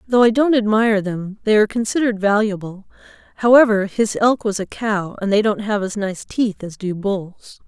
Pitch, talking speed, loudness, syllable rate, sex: 210 Hz, 195 wpm, -18 LUFS, 5.2 syllables/s, female